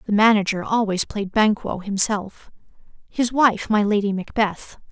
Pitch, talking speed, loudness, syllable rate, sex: 210 Hz, 135 wpm, -20 LUFS, 4.5 syllables/s, female